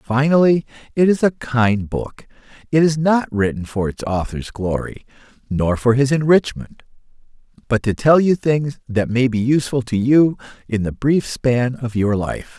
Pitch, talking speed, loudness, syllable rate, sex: 130 Hz, 170 wpm, -18 LUFS, 4.5 syllables/s, male